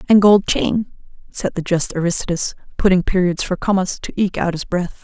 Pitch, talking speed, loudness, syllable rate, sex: 185 Hz, 190 wpm, -18 LUFS, 5.4 syllables/s, female